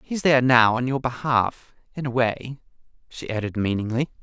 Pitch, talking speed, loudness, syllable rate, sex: 125 Hz, 185 wpm, -22 LUFS, 5.4 syllables/s, male